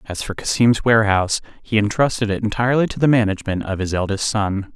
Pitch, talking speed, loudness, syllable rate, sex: 105 Hz, 190 wpm, -19 LUFS, 6.3 syllables/s, male